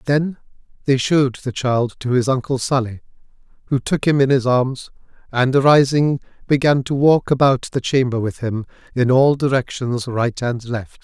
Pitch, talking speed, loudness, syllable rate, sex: 130 Hz, 170 wpm, -18 LUFS, 4.7 syllables/s, male